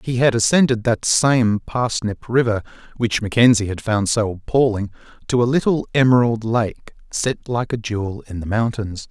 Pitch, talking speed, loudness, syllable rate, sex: 115 Hz, 165 wpm, -19 LUFS, 4.7 syllables/s, male